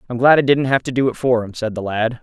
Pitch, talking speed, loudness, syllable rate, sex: 125 Hz, 350 wpm, -17 LUFS, 6.3 syllables/s, male